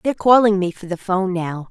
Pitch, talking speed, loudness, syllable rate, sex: 195 Hz, 245 wpm, -17 LUFS, 6.3 syllables/s, female